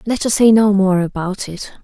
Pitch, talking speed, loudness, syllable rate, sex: 200 Hz, 230 wpm, -15 LUFS, 4.7 syllables/s, female